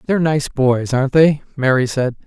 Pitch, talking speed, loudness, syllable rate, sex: 135 Hz, 185 wpm, -16 LUFS, 5.2 syllables/s, male